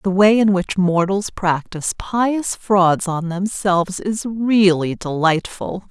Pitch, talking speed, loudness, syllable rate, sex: 190 Hz, 130 wpm, -18 LUFS, 3.7 syllables/s, female